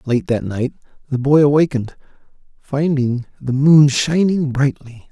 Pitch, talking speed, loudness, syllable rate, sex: 140 Hz, 130 wpm, -16 LUFS, 4.4 syllables/s, male